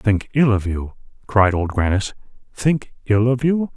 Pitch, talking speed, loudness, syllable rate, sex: 115 Hz, 175 wpm, -19 LUFS, 4.2 syllables/s, male